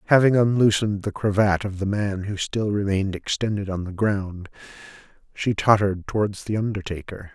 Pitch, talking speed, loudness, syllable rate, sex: 100 Hz, 155 wpm, -23 LUFS, 5.4 syllables/s, male